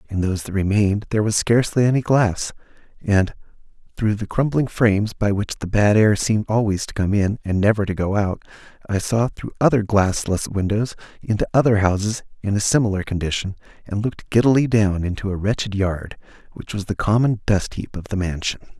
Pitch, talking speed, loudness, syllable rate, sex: 105 Hz, 190 wpm, -20 LUFS, 5.7 syllables/s, male